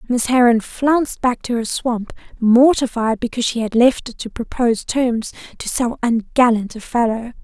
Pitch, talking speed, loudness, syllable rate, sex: 240 Hz, 170 wpm, -18 LUFS, 4.8 syllables/s, female